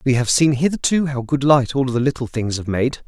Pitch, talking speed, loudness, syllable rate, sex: 135 Hz, 255 wpm, -18 LUFS, 5.4 syllables/s, male